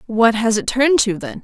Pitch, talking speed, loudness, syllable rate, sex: 235 Hz, 250 wpm, -16 LUFS, 5.5 syllables/s, female